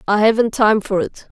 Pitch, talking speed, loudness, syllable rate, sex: 215 Hz, 215 wpm, -16 LUFS, 5.0 syllables/s, female